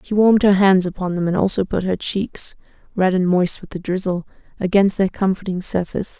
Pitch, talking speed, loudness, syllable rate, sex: 190 Hz, 185 wpm, -19 LUFS, 5.8 syllables/s, female